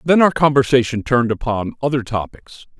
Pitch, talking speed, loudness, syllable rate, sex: 130 Hz, 150 wpm, -17 LUFS, 5.6 syllables/s, male